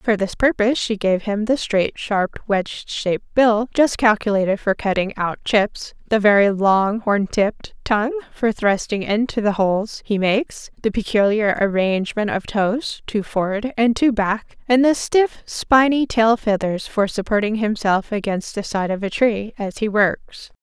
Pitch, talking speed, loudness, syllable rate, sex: 215 Hz, 170 wpm, -19 LUFS, 4.4 syllables/s, female